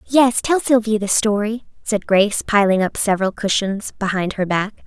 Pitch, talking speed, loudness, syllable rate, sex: 210 Hz, 175 wpm, -18 LUFS, 5.1 syllables/s, female